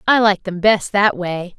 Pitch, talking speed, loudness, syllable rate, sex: 195 Hz, 225 wpm, -16 LUFS, 4.1 syllables/s, female